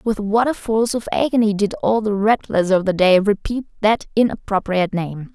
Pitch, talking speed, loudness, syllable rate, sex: 210 Hz, 190 wpm, -18 LUFS, 5.2 syllables/s, female